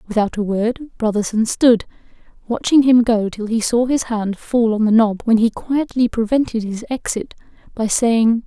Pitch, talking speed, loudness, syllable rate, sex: 225 Hz, 175 wpm, -17 LUFS, 4.6 syllables/s, female